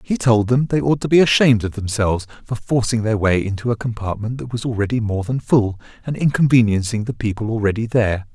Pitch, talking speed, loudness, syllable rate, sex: 115 Hz, 210 wpm, -18 LUFS, 6.0 syllables/s, male